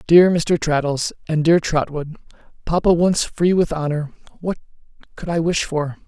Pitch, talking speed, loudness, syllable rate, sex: 160 Hz, 160 wpm, -19 LUFS, 4.6 syllables/s, male